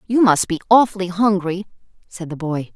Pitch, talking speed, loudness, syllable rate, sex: 190 Hz, 175 wpm, -18 LUFS, 5.4 syllables/s, female